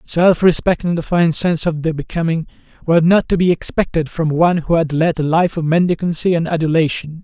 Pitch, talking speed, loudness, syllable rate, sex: 165 Hz, 200 wpm, -16 LUFS, 5.8 syllables/s, male